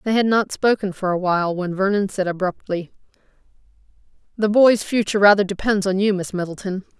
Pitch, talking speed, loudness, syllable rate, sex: 195 Hz, 165 wpm, -19 LUFS, 5.8 syllables/s, female